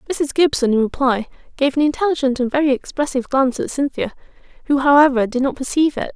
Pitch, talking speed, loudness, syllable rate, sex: 275 Hz, 185 wpm, -18 LUFS, 6.7 syllables/s, female